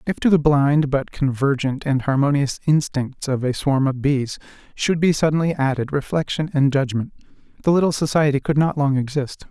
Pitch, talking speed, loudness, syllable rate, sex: 140 Hz, 175 wpm, -20 LUFS, 5.1 syllables/s, male